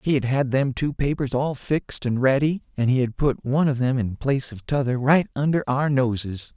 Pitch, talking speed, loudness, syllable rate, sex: 135 Hz, 230 wpm, -23 LUFS, 5.3 syllables/s, male